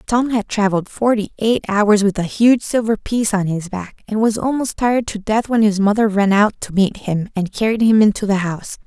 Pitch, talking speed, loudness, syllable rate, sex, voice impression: 210 Hz, 230 wpm, -17 LUFS, 5.3 syllables/s, female, feminine, adult-like, soft, fluent, raspy, slightly cute, calm, friendly, reassuring, elegant, kind, modest